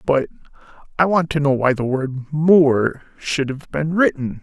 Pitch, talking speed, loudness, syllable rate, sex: 145 Hz, 175 wpm, -18 LUFS, 4.0 syllables/s, male